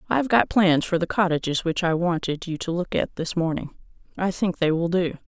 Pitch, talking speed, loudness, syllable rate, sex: 175 Hz, 235 wpm, -23 LUFS, 5.4 syllables/s, female